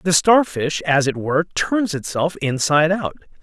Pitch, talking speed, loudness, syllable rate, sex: 165 Hz, 160 wpm, -18 LUFS, 4.7 syllables/s, male